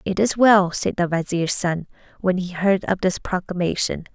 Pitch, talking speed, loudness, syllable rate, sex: 185 Hz, 190 wpm, -21 LUFS, 4.7 syllables/s, female